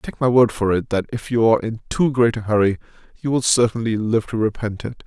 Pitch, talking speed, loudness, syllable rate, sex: 115 Hz, 250 wpm, -19 LUFS, 5.8 syllables/s, male